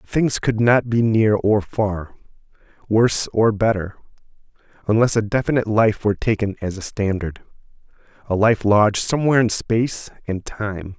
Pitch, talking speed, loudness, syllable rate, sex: 110 Hz, 145 wpm, -19 LUFS, 5.0 syllables/s, male